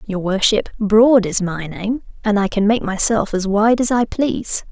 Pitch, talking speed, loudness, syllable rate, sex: 210 Hz, 205 wpm, -17 LUFS, 4.4 syllables/s, female